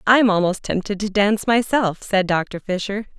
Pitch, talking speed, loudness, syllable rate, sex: 205 Hz, 170 wpm, -20 LUFS, 4.8 syllables/s, female